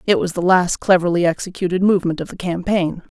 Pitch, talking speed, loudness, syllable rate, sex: 180 Hz, 190 wpm, -18 LUFS, 6.1 syllables/s, female